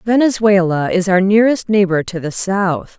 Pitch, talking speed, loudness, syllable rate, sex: 195 Hz, 160 wpm, -15 LUFS, 4.9 syllables/s, female